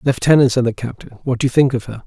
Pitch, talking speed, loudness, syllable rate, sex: 125 Hz, 290 wpm, -16 LUFS, 7.2 syllables/s, male